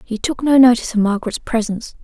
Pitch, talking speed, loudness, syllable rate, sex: 230 Hz, 205 wpm, -16 LUFS, 6.9 syllables/s, female